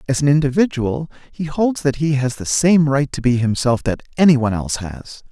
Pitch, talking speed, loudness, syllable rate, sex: 140 Hz, 205 wpm, -17 LUFS, 5.3 syllables/s, male